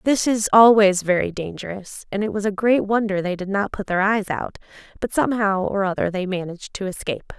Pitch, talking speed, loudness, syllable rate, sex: 200 Hz, 210 wpm, -20 LUFS, 5.7 syllables/s, female